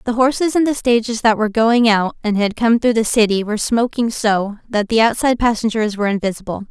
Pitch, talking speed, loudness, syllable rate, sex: 225 Hz, 215 wpm, -16 LUFS, 5.9 syllables/s, female